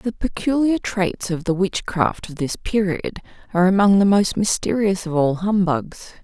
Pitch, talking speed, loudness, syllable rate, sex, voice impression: 190 Hz, 165 wpm, -20 LUFS, 4.6 syllables/s, female, feminine, adult-like, tensed, slightly powerful, clear, fluent, intellectual, calm, slightly reassuring, elegant, slightly strict, slightly sharp